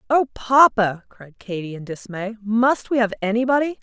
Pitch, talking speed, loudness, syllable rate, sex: 225 Hz, 155 wpm, -20 LUFS, 4.7 syllables/s, female